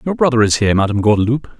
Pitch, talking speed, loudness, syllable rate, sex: 120 Hz, 225 wpm, -14 LUFS, 7.8 syllables/s, male